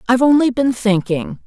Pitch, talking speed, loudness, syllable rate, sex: 235 Hz, 165 wpm, -16 LUFS, 5.7 syllables/s, female